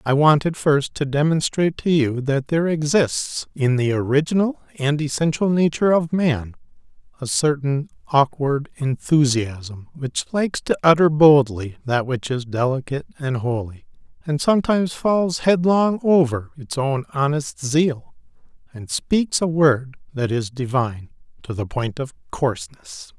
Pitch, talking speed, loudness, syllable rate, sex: 145 Hz, 140 wpm, -20 LUFS, 4.5 syllables/s, male